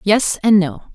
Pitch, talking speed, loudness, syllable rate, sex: 195 Hz, 190 wpm, -16 LUFS, 4.2 syllables/s, female